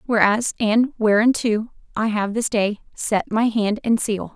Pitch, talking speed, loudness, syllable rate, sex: 220 Hz, 165 wpm, -20 LUFS, 4.0 syllables/s, female